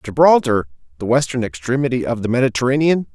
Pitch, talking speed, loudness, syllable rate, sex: 125 Hz, 135 wpm, -17 LUFS, 6.4 syllables/s, male